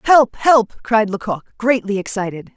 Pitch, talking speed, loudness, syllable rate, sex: 220 Hz, 140 wpm, -17 LUFS, 4.3 syllables/s, female